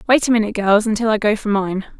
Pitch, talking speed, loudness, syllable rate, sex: 215 Hz, 270 wpm, -17 LUFS, 6.7 syllables/s, female